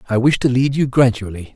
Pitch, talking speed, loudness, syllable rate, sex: 120 Hz, 230 wpm, -16 LUFS, 5.9 syllables/s, male